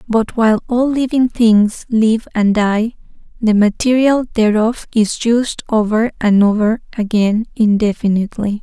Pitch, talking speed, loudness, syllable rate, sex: 220 Hz, 125 wpm, -15 LUFS, 4.2 syllables/s, female